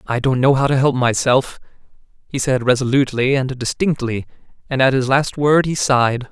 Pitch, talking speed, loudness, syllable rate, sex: 130 Hz, 180 wpm, -17 LUFS, 5.4 syllables/s, male